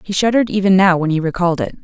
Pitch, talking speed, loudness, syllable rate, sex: 185 Hz, 260 wpm, -15 LUFS, 7.7 syllables/s, female